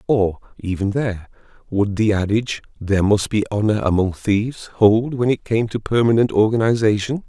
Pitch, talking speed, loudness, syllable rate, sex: 105 Hz, 155 wpm, -19 LUFS, 5.3 syllables/s, male